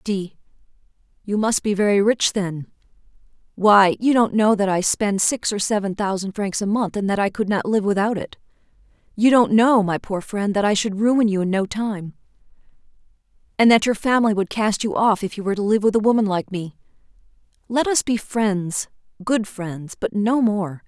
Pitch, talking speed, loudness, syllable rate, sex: 205 Hz, 200 wpm, -20 LUFS, 5.0 syllables/s, female